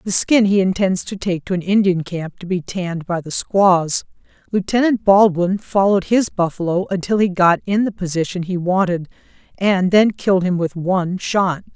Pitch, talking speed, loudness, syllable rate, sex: 185 Hz, 185 wpm, -18 LUFS, 4.9 syllables/s, female